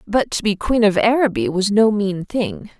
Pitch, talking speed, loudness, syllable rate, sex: 210 Hz, 215 wpm, -18 LUFS, 4.6 syllables/s, female